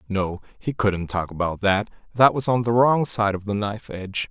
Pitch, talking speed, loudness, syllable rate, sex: 105 Hz, 225 wpm, -22 LUFS, 5.0 syllables/s, male